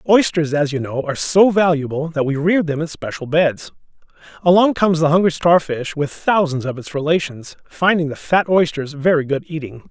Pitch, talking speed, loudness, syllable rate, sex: 160 Hz, 190 wpm, -17 LUFS, 5.3 syllables/s, male